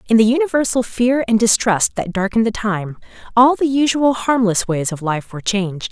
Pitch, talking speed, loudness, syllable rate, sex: 220 Hz, 195 wpm, -17 LUFS, 5.4 syllables/s, female